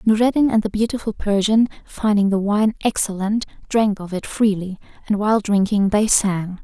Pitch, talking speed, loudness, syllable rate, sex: 210 Hz, 165 wpm, -19 LUFS, 5.0 syllables/s, female